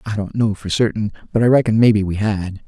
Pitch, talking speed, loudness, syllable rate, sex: 105 Hz, 245 wpm, -17 LUFS, 5.9 syllables/s, male